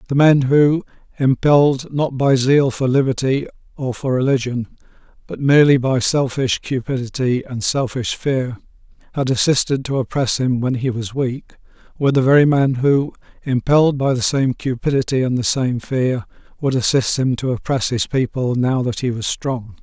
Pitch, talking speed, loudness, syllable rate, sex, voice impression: 130 Hz, 165 wpm, -18 LUFS, 4.8 syllables/s, male, masculine, slightly old, slightly thick, slightly muffled, calm, slightly reassuring, slightly kind